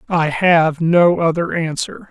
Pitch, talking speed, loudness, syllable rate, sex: 165 Hz, 145 wpm, -16 LUFS, 3.6 syllables/s, male